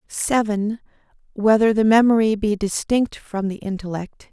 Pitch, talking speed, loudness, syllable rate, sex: 210 Hz, 125 wpm, -20 LUFS, 4.8 syllables/s, female